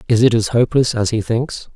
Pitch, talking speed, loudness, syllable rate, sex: 115 Hz, 240 wpm, -16 LUFS, 5.8 syllables/s, male